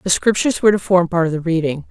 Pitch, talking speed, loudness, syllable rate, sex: 175 Hz, 285 wpm, -16 LUFS, 7.2 syllables/s, female